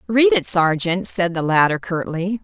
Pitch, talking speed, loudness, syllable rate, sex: 175 Hz, 175 wpm, -18 LUFS, 4.4 syllables/s, female